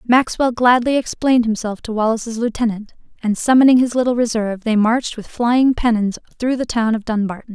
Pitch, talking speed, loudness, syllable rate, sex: 230 Hz, 175 wpm, -17 LUFS, 5.7 syllables/s, female